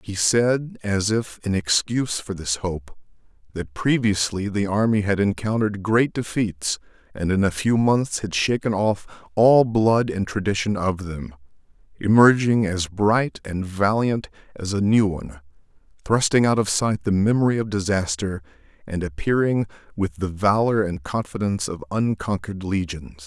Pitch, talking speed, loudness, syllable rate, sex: 100 Hz, 150 wpm, -22 LUFS, 4.6 syllables/s, male